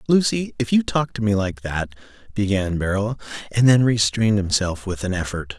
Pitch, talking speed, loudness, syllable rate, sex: 105 Hz, 185 wpm, -21 LUFS, 5.2 syllables/s, male